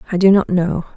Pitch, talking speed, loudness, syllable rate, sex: 185 Hz, 250 wpm, -15 LUFS, 6.3 syllables/s, female